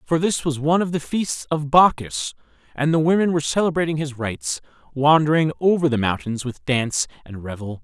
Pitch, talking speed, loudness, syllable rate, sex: 145 Hz, 185 wpm, -21 LUFS, 5.6 syllables/s, male